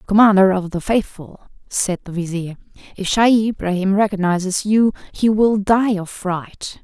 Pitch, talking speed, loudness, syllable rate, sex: 200 Hz, 150 wpm, -18 LUFS, 4.5 syllables/s, female